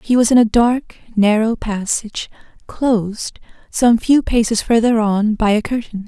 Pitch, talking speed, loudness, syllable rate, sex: 225 Hz, 160 wpm, -16 LUFS, 4.5 syllables/s, female